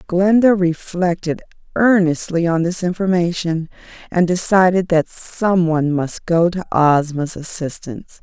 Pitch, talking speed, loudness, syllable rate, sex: 175 Hz, 110 wpm, -17 LUFS, 4.3 syllables/s, female